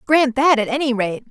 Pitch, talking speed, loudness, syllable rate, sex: 255 Hz, 230 wpm, -17 LUFS, 5.4 syllables/s, female